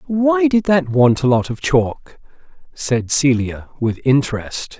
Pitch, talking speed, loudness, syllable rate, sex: 145 Hz, 150 wpm, -17 LUFS, 3.7 syllables/s, male